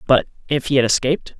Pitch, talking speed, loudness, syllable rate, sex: 135 Hz, 215 wpm, -18 LUFS, 6.9 syllables/s, male